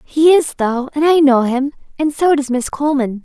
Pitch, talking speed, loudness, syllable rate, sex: 280 Hz, 220 wpm, -15 LUFS, 4.9 syllables/s, female